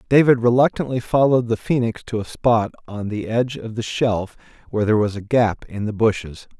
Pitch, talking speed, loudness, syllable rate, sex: 115 Hz, 200 wpm, -20 LUFS, 5.7 syllables/s, male